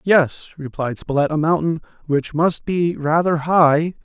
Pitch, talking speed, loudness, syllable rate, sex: 160 Hz, 150 wpm, -19 LUFS, 4.1 syllables/s, male